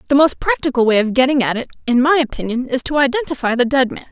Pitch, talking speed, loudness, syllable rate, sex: 265 Hz, 250 wpm, -16 LUFS, 6.9 syllables/s, female